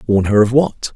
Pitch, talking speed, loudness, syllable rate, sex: 115 Hz, 250 wpm, -14 LUFS, 4.9 syllables/s, male